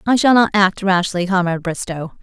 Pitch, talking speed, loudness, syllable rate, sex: 190 Hz, 190 wpm, -16 LUFS, 5.6 syllables/s, female